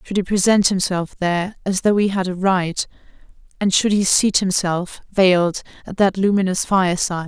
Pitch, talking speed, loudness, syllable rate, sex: 190 Hz, 175 wpm, -18 LUFS, 5.1 syllables/s, female